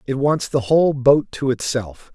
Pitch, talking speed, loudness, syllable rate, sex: 135 Hz, 195 wpm, -18 LUFS, 4.6 syllables/s, male